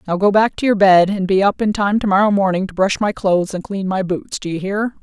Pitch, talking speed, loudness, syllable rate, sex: 195 Hz, 300 wpm, -16 LUFS, 5.8 syllables/s, female